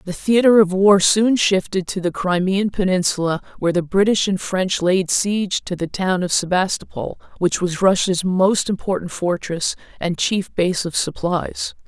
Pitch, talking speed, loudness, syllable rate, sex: 185 Hz, 165 wpm, -19 LUFS, 4.5 syllables/s, female